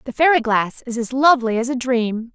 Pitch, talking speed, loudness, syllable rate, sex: 245 Hz, 230 wpm, -18 LUFS, 5.5 syllables/s, female